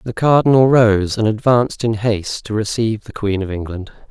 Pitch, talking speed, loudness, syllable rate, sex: 110 Hz, 190 wpm, -16 LUFS, 5.5 syllables/s, male